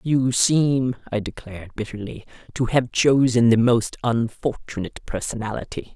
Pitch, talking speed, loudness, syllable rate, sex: 120 Hz, 120 wpm, -21 LUFS, 4.7 syllables/s, female